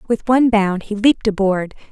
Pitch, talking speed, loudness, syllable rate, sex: 215 Hz, 190 wpm, -16 LUFS, 5.6 syllables/s, female